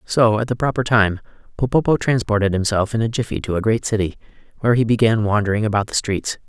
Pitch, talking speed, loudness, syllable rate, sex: 110 Hz, 205 wpm, -19 LUFS, 6.3 syllables/s, male